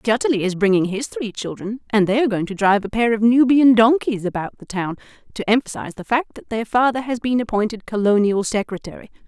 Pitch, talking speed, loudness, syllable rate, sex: 220 Hz, 205 wpm, -19 LUFS, 6.1 syllables/s, female